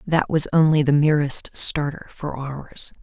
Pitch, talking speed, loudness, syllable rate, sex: 150 Hz, 160 wpm, -20 LUFS, 4.1 syllables/s, female